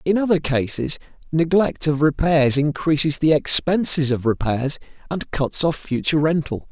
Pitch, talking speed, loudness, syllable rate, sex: 150 Hz, 145 wpm, -19 LUFS, 4.7 syllables/s, male